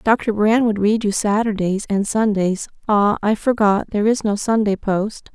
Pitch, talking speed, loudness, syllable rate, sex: 210 Hz, 170 wpm, -18 LUFS, 4.5 syllables/s, female